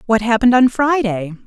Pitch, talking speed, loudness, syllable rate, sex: 230 Hz, 165 wpm, -15 LUFS, 5.8 syllables/s, female